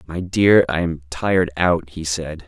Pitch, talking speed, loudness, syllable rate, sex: 85 Hz, 195 wpm, -19 LUFS, 4.3 syllables/s, male